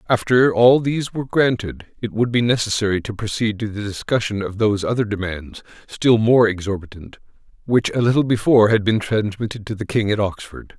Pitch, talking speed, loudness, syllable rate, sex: 110 Hz, 185 wpm, -19 LUFS, 5.6 syllables/s, male